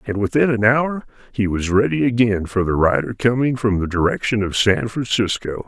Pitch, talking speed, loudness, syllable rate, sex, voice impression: 110 Hz, 190 wpm, -18 LUFS, 5.1 syllables/s, male, masculine, old, slightly relaxed, powerful, hard, muffled, raspy, slightly sincere, calm, mature, wild, slightly lively, strict, slightly sharp